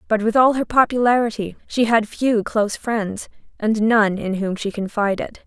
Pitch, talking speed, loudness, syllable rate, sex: 220 Hz, 185 wpm, -19 LUFS, 5.1 syllables/s, female